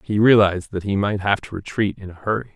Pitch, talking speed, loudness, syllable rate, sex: 100 Hz, 260 wpm, -20 LUFS, 6.3 syllables/s, male